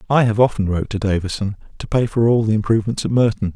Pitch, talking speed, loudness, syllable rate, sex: 110 Hz, 235 wpm, -18 LUFS, 7.0 syllables/s, male